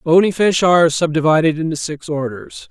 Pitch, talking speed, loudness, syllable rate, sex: 160 Hz, 155 wpm, -16 LUFS, 5.4 syllables/s, male